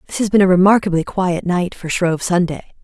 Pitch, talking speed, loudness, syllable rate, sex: 180 Hz, 210 wpm, -16 LUFS, 5.8 syllables/s, female